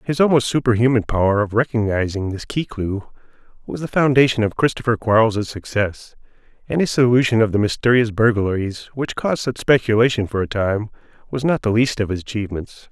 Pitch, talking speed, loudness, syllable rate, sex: 115 Hz, 170 wpm, -19 LUFS, 5.7 syllables/s, male